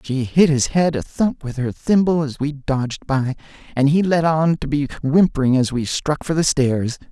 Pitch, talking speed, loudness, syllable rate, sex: 145 Hz, 220 wpm, -19 LUFS, 4.7 syllables/s, male